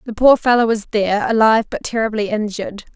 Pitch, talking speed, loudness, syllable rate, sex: 220 Hz, 185 wpm, -16 LUFS, 6.6 syllables/s, female